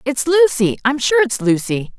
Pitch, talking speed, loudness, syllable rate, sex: 230 Hz, 150 wpm, -16 LUFS, 4.4 syllables/s, female